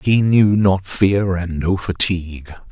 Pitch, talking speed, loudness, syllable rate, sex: 95 Hz, 155 wpm, -17 LUFS, 3.6 syllables/s, male